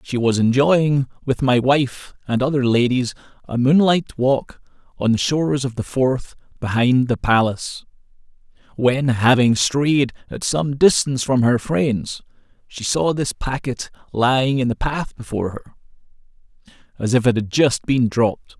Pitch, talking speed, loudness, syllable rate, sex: 130 Hz, 150 wpm, -19 LUFS, 4.4 syllables/s, male